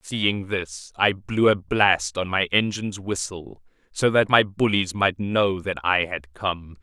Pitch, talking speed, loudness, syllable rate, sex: 95 Hz, 175 wpm, -22 LUFS, 3.8 syllables/s, male